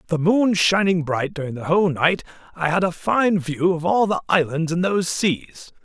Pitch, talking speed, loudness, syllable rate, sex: 175 Hz, 205 wpm, -20 LUFS, 4.9 syllables/s, male